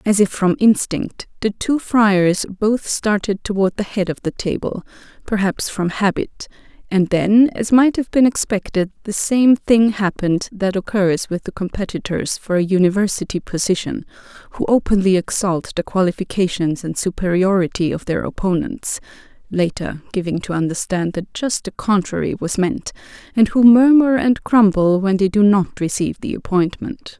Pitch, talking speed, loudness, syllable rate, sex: 200 Hz, 155 wpm, -18 LUFS, 4.8 syllables/s, female